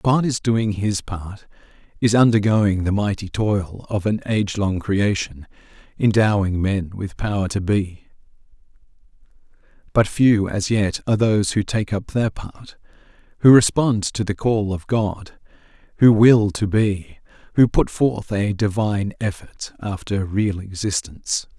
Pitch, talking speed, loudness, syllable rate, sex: 105 Hz, 145 wpm, -20 LUFS, 4.2 syllables/s, male